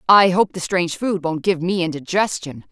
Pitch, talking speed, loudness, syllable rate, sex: 175 Hz, 200 wpm, -19 LUFS, 5.2 syllables/s, female